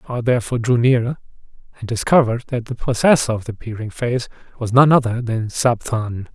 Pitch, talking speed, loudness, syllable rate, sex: 120 Hz, 180 wpm, -18 LUFS, 5.6 syllables/s, male